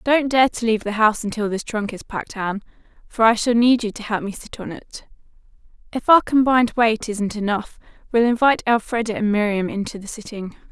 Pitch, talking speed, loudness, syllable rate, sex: 220 Hz, 215 wpm, -20 LUFS, 6.0 syllables/s, female